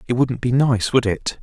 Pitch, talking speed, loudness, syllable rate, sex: 125 Hz, 250 wpm, -19 LUFS, 4.8 syllables/s, male